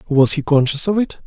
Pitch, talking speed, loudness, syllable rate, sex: 155 Hz, 235 wpm, -16 LUFS, 5.5 syllables/s, male